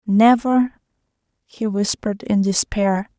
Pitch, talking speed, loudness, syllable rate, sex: 215 Hz, 95 wpm, -19 LUFS, 3.8 syllables/s, female